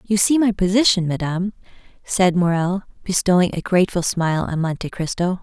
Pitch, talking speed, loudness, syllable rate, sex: 180 Hz, 155 wpm, -19 LUFS, 5.6 syllables/s, female